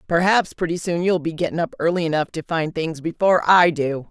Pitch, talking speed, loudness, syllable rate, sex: 165 Hz, 220 wpm, -20 LUFS, 5.6 syllables/s, female